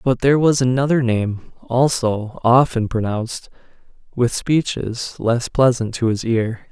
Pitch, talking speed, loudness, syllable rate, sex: 120 Hz, 125 wpm, -18 LUFS, 4.2 syllables/s, male